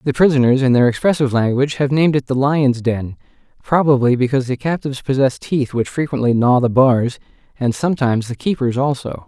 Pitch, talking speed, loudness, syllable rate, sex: 130 Hz, 180 wpm, -16 LUFS, 6.0 syllables/s, male